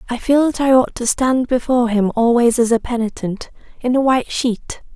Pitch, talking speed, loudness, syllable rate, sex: 240 Hz, 195 wpm, -17 LUFS, 5.3 syllables/s, female